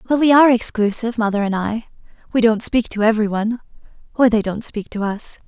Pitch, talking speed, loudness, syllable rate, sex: 225 Hz, 185 wpm, -18 LUFS, 6.1 syllables/s, female